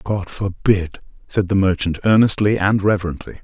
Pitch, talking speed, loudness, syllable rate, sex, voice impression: 95 Hz, 140 wpm, -18 LUFS, 5.1 syllables/s, male, very masculine, very adult-like, slightly old, very thick, very tensed, very powerful, slightly bright, soft, slightly muffled, fluent, slightly raspy, very cool, very intellectual, very sincere, very calm, very mature, friendly, very reassuring, very unique, elegant, wild, sweet, lively, very kind, modest